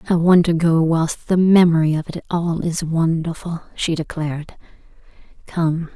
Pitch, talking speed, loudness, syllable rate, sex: 165 Hz, 150 wpm, -18 LUFS, 4.5 syllables/s, female